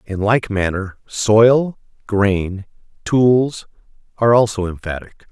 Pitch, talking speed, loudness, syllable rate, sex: 105 Hz, 100 wpm, -17 LUFS, 3.6 syllables/s, male